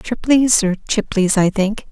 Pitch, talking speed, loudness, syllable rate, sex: 210 Hz, 155 wpm, -16 LUFS, 3.8 syllables/s, female